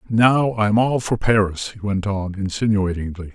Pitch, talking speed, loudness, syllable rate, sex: 105 Hz, 160 wpm, -20 LUFS, 4.6 syllables/s, male